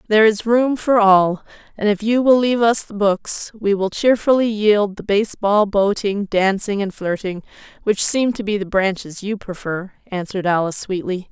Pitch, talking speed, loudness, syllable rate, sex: 205 Hz, 180 wpm, -18 LUFS, 4.9 syllables/s, female